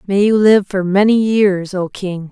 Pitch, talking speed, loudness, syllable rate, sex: 195 Hz, 205 wpm, -14 LUFS, 4.2 syllables/s, female